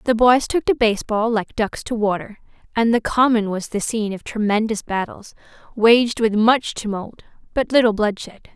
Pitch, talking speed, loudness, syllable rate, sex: 220 Hz, 180 wpm, -19 LUFS, 4.8 syllables/s, female